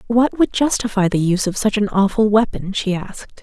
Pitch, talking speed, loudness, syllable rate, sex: 210 Hz, 210 wpm, -18 LUFS, 5.5 syllables/s, female